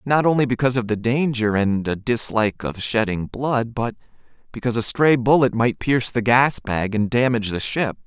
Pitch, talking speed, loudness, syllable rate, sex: 120 Hz, 195 wpm, -20 LUFS, 5.3 syllables/s, male